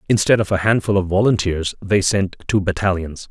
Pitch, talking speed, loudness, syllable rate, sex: 95 Hz, 180 wpm, -18 LUFS, 5.4 syllables/s, male